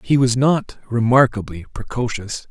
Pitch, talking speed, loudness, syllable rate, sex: 120 Hz, 120 wpm, -18 LUFS, 4.5 syllables/s, male